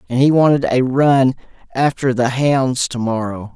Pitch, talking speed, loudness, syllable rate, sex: 130 Hz, 170 wpm, -16 LUFS, 4.4 syllables/s, male